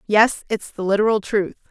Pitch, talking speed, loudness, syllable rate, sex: 205 Hz, 175 wpm, -20 LUFS, 5.0 syllables/s, female